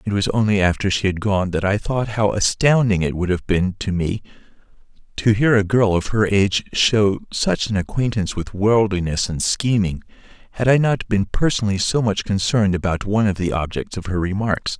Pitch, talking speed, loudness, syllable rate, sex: 100 Hz, 200 wpm, -19 LUFS, 5.3 syllables/s, male